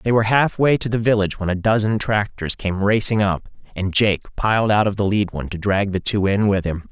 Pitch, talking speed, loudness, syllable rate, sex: 100 Hz, 245 wpm, -19 LUFS, 5.7 syllables/s, male